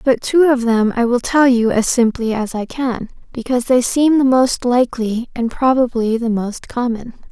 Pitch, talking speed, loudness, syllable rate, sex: 245 Hz, 195 wpm, -16 LUFS, 4.7 syllables/s, female